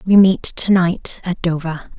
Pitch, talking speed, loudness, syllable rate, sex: 175 Hz, 180 wpm, -17 LUFS, 4.0 syllables/s, female